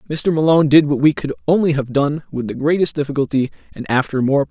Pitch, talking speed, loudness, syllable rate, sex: 145 Hz, 225 wpm, -17 LUFS, 6.4 syllables/s, male